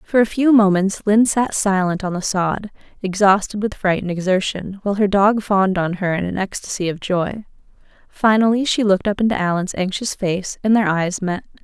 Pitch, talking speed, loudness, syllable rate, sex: 195 Hz, 195 wpm, -18 LUFS, 5.3 syllables/s, female